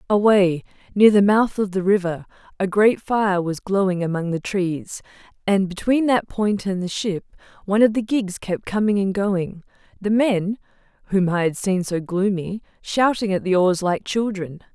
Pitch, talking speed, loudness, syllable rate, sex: 195 Hz, 180 wpm, -21 LUFS, 4.5 syllables/s, female